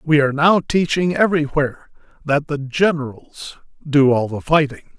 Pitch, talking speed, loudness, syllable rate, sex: 150 Hz, 145 wpm, -18 LUFS, 5.2 syllables/s, male